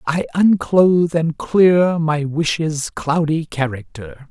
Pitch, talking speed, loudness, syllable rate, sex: 160 Hz, 110 wpm, -17 LUFS, 3.7 syllables/s, male